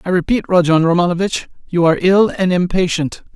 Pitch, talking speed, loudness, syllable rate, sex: 180 Hz, 160 wpm, -15 LUFS, 5.8 syllables/s, male